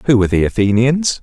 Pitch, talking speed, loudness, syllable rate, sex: 120 Hz, 195 wpm, -14 LUFS, 6.5 syllables/s, male